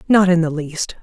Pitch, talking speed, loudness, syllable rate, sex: 170 Hz, 235 wpm, -17 LUFS, 4.9 syllables/s, female